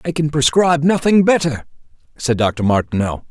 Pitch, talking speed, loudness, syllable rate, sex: 140 Hz, 145 wpm, -16 LUFS, 5.2 syllables/s, male